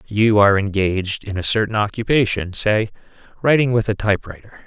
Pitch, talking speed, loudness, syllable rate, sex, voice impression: 105 Hz, 155 wpm, -18 LUFS, 5.8 syllables/s, male, very masculine, slightly young, adult-like, very thick, slightly relaxed, slightly weak, slightly dark, soft, muffled, fluent, cool, very intellectual, slightly refreshing, very sincere, very calm, mature, very friendly, very reassuring, unique, very elegant, slightly wild, slightly sweet, slightly lively, very kind, very modest, slightly light